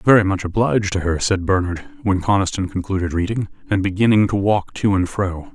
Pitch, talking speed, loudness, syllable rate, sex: 95 Hz, 195 wpm, -19 LUFS, 5.6 syllables/s, male